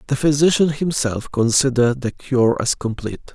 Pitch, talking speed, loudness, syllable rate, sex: 130 Hz, 145 wpm, -18 LUFS, 5.1 syllables/s, male